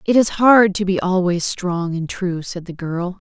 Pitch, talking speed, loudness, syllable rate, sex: 185 Hz, 220 wpm, -18 LUFS, 4.2 syllables/s, female